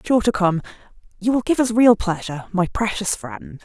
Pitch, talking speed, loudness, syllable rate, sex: 205 Hz, 215 wpm, -20 LUFS, 5.6 syllables/s, female